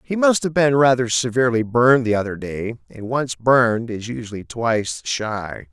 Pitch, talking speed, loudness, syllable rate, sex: 120 Hz, 180 wpm, -19 LUFS, 5.0 syllables/s, male